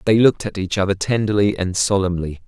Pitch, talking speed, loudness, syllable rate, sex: 95 Hz, 195 wpm, -19 LUFS, 6.1 syllables/s, male